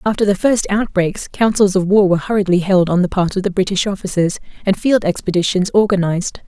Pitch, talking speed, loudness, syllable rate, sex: 190 Hz, 195 wpm, -16 LUFS, 6.0 syllables/s, female